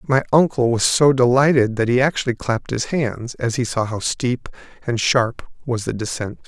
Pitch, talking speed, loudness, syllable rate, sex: 125 Hz, 185 wpm, -19 LUFS, 5.0 syllables/s, male